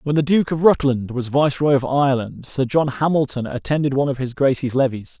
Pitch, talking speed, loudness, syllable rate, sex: 135 Hz, 210 wpm, -19 LUFS, 5.9 syllables/s, male